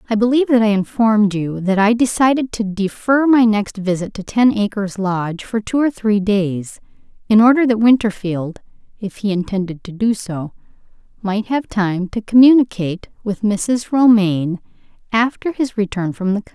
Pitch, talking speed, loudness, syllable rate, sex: 210 Hz, 170 wpm, -17 LUFS, 4.7 syllables/s, female